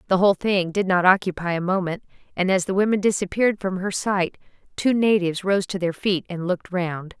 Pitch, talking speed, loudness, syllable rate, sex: 185 Hz, 210 wpm, -22 LUFS, 5.7 syllables/s, female